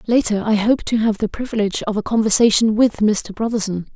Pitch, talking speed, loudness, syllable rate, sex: 215 Hz, 195 wpm, -18 LUFS, 6.0 syllables/s, female